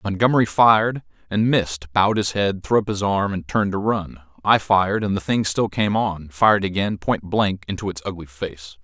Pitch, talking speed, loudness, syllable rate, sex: 100 Hz, 210 wpm, -20 LUFS, 5.3 syllables/s, male